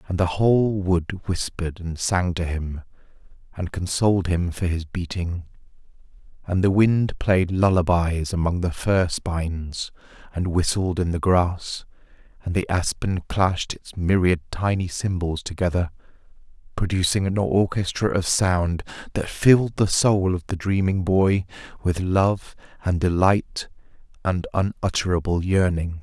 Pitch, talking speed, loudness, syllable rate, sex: 90 Hz, 135 wpm, -23 LUFS, 4.3 syllables/s, male